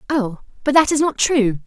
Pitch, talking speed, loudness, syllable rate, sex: 260 Hz, 215 wpm, -18 LUFS, 5.1 syllables/s, female